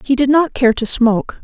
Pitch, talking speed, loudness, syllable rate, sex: 255 Hz, 250 wpm, -14 LUFS, 5.4 syllables/s, female